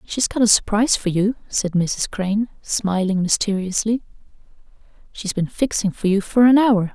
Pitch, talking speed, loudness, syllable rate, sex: 205 Hz, 165 wpm, -19 LUFS, 5.0 syllables/s, female